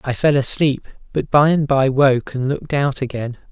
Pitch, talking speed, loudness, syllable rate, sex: 135 Hz, 205 wpm, -18 LUFS, 4.8 syllables/s, male